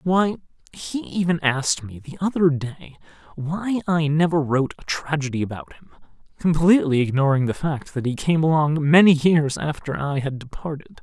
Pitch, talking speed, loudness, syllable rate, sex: 155 Hz, 165 wpm, -21 LUFS, 5.1 syllables/s, male